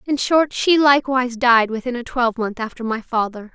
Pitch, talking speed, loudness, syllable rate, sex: 245 Hz, 185 wpm, -18 LUFS, 5.5 syllables/s, female